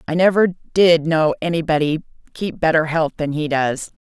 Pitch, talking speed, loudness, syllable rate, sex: 160 Hz, 165 wpm, -18 LUFS, 4.8 syllables/s, female